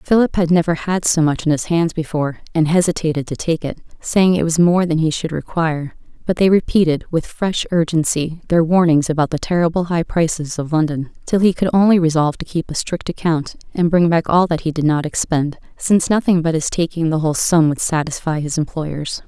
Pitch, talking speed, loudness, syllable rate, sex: 165 Hz, 215 wpm, -17 LUFS, 5.6 syllables/s, female